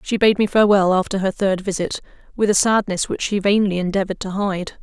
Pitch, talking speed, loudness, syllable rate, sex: 195 Hz, 210 wpm, -19 LUFS, 6.1 syllables/s, female